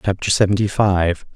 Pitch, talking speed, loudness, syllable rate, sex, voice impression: 95 Hz, 135 wpm, -17 LUFS, 5.0 syllables/s, male, very masculine, very middle-aged, very thick, slightly tensed, weak, slightly bright, very soft, very muffled, very fluent, raspy, cool, very intellectual, slightly refreshing, sincere, very calm, very mature, friendly, reassuring, very unique, very elegant, very wild, sweet, slightly lively, kind, modest